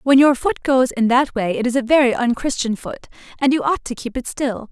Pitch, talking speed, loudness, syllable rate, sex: 255 Hz, 255 wpm, -18 LUFS, 5.4 syllables/s, female